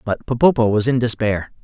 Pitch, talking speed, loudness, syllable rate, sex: 115 Hz, 185 wpm, -17 LUFS, 5.5 syllables/s, male